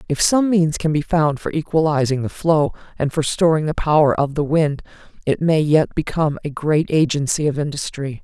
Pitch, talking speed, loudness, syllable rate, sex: 150 Hz, 195 wpm, -19 LUFS, 5.2 syllables/s, female